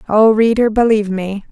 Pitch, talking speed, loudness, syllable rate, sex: 215 Hz, 160 wpm, -13 LUFS, 5.4 syllables/s, female